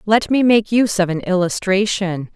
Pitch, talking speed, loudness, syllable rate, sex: 200 Hz, 180 wpm, -17 LUFS, 5.0 syllables/s, female